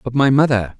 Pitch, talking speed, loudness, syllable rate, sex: 130 Hz, 225 wpm, -15 LUFS, 5.8 syllables/s, male